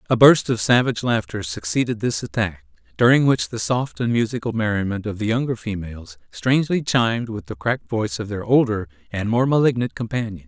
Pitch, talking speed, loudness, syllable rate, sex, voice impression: 110 Hz, 185 wpm, -21 LUFS, 5.8 syllables/s, male, masculine, adult-like, tensed, bright, clear, fluent, cool, intellectual, refreshing, friendly, reassuring, wild, lively, kind